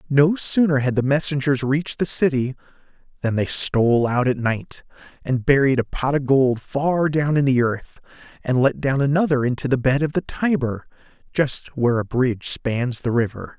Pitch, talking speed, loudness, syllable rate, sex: 135 Hz, 185 wpm, -20 LUFS, 4.9 syllables/s, male